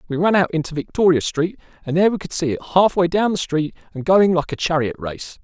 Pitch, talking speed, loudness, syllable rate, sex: 170 Hz, 245 wpm, -19 LUFS, 6.1 syllables/s, male